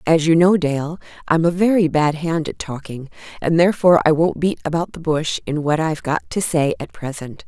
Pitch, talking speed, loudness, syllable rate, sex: 160 Hz, 215 wpm, -18 LUFS, 5.4 syllables/s, female